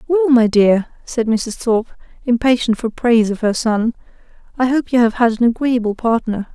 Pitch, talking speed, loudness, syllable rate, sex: 235 Hz, 185 wpm, -16 LUFS, 5.1 syllables/s, female